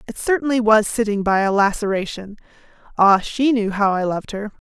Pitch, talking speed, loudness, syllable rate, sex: 210 Hz, 180 wpm, -18 LUFS, 5.6 syllables/s, female